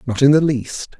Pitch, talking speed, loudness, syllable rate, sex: 135 Hz, 240 wpm, -16 LUFS, 4.8 syllables/s, male